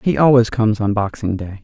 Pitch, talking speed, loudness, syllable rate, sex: 110 Hz, 220 wpm, -16 LUFS, 5.9 syllables/s, male